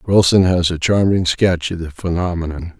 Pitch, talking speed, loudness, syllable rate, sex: 90 Hz, 170 wpm, -17 LUFS, 4.9 syllables/s, male